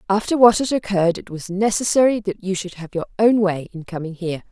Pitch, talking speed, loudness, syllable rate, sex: 195 Hz, 225 wpm, -19 LUFS, 6.1 syllables/s, female